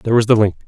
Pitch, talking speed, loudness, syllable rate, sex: 110 Hz, 355 wpm, -14 LUFS, 8.9 syllables/s, male